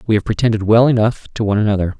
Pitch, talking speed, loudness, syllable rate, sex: 110 Hz, 240 wpm, -15 LUFS, 7.9 syllables/s, male